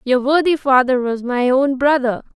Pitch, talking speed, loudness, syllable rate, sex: 260 Hz, 175 wpm, -16 LUFS, 4.6 syllables/s, female